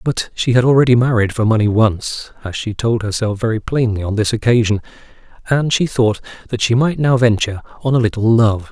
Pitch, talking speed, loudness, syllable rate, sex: 115 Hz, 200 wpm, -16 LUFS, 5.6 syllables/s, male